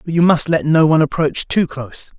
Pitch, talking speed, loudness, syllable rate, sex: 155 Hz, 245 wpm, -15 LUFS, 5.9 syllables/s, male